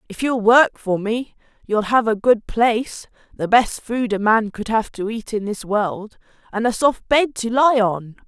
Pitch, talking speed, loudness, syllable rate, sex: 225 Hz, 210 wpm, -19 LUFS, 4.3 syllables/s, female